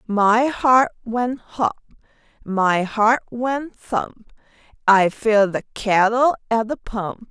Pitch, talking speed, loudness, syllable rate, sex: 225 Hz, 125 wpm, -19 LUFS, 3.0 syllables/s, female